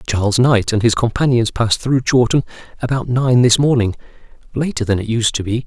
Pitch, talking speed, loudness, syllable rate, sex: 120 Hz, 190 wpm, -16 LUFS, 5.7 syllables/s, male